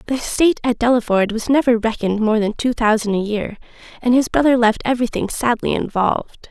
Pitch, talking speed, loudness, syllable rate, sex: 230 Hz, 185 wpm, -18 LUFS, 6.0 syllables/s, female